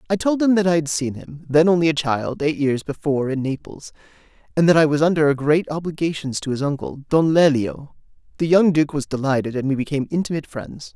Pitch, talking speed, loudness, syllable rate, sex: 150 Hz, 215 wpm, -20 LUFS, 5.9 syllables/s, male